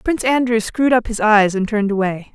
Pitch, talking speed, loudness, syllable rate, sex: 220 Hz, 230 wpm, -17 LUFS, 6.2 syllables/s, female